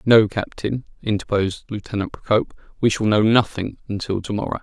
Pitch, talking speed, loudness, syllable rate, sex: 110 Hz, 155 wpm, -21 LUFS, 5.8 syllables/s, male